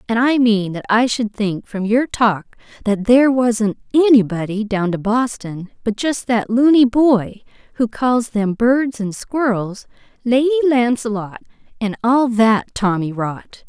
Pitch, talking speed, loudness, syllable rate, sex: 230 Hz, 150 wpm, -17 LUFS, 4.0 syllables/s, female